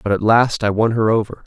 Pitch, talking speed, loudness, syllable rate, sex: 110 Hz, 285 wpm, -16 LUFS, 5.6 syllables/s, male